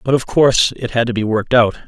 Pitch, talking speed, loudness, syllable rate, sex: 120 Hz, 290 wpm, -15 LUFS, 6.3 syllables/s, male